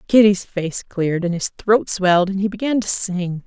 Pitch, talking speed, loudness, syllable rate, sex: 195 Hz, 190 wpm, -19 LUFS, 4.6 syllables/s, female